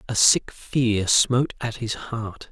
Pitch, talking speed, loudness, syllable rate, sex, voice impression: 115 Hz, 165 wpm, -22 LUFS, 3.5 syllables/s, male, masculine, adult-like, slightly relaxed, slightly dark, raspy, cool, intellectual, calm, slightly mature, wild, kind, modest